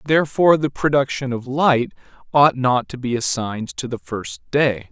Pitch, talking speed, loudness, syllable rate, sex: 130 Hz, 170 wpm, -19 LUFS, 4.8 syllables/s, male